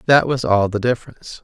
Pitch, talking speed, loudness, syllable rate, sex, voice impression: 115 Hz, 210 wpm, -18 LUFS, 6.3 syllables/s, male, masculine, adult-like, slightly relaxed, weak, slightly fluent, cool, calm, reassuring, sweet